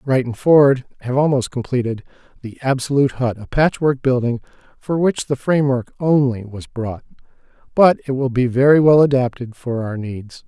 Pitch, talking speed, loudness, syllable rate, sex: 130 Hz, 160 wpm, -18 LUFS, 5.1 syllables/s, male